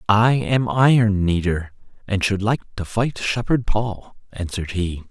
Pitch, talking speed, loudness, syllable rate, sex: 105 Hz, 155 wpm, -20 LUFS, 4.1 syllables/s, male